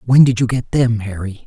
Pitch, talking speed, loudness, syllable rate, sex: 115 Hz, 245 wpm, -16 LUFS, 4.9 syllables/s, male